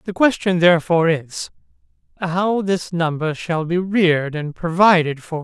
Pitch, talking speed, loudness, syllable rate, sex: 170 Hz, 145 wpm, -18 LUFS, 4.5 syllables/s, male